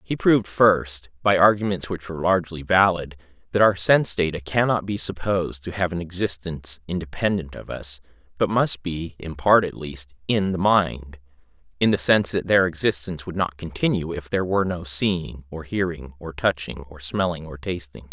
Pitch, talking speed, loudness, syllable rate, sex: 85 Hz, 180 wpm, -22 LUFS, 5.2 syllables/s, male